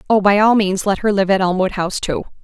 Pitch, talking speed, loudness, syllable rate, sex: 200 Hz, 270 wpm, -16 LUFS, 6.3 syllables/s, female